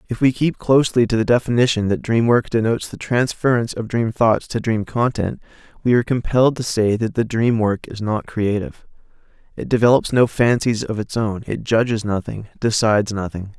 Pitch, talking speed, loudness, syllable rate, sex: 115 Hz, 190 wpm, -19 LUFS, 5.5 syllables/s, male